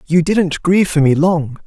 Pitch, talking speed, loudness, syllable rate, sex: 165 Hz, 215 wpm, -14 LUFS, 4.7 syllables/s, male